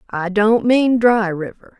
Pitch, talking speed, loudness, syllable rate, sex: 215 Hz, 165 wpm, -16 LUFS, 3.8 syllables/s, female